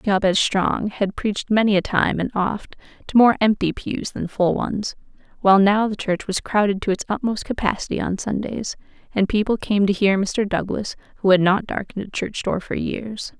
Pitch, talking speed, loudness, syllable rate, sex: 205 Hz, 195 wpm, -21 LUFS, 5.0 syllables/s, female